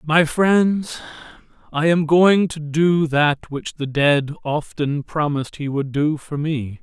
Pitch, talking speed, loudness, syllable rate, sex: 155 Hz, 160 wpm, -19 LUFS, 3.6 syllables/s, male